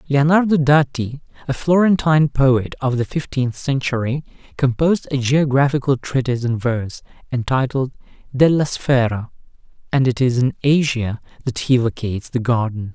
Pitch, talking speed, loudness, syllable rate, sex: 130 Hz, 130 wpm, -18 LUFS, 5.0 syllables/s, male